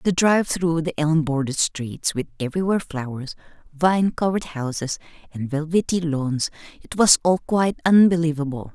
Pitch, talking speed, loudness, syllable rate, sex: 160 Hz, 135 wpm, -21 LUFS, 5.3 syllables/s, female